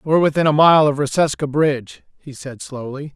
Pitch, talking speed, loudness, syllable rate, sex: 145 Hz, 190 wpm, -16 LUFS, 5.4 syllables/s, male